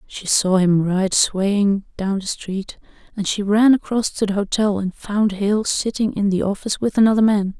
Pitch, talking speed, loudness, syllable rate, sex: 200 Hz, 195 wpm, -19 LUFS, 4.6 syllables/s, female